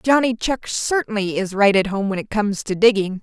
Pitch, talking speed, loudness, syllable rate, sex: 210 Hz, 225 wpm, -19 LUFS, 5.3 syllables/s, female